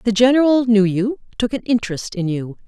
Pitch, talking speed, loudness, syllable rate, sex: 225 Hz, 200 wpm, -18 LUFS, 5.7 syllables/s, female